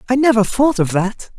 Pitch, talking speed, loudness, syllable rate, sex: 230 Hz, 215 wpm, -16 LUFS, 5.1 syllables/s, male